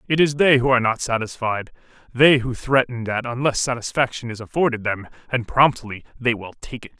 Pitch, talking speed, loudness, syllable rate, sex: 120 Hz, 190 wpm, -20 LUFS, 5.6 syllables/s, male